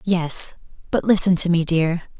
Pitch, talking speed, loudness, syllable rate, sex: 175 Hz, 165 wpm, -19 LUFS, 4.4 syllables/s, female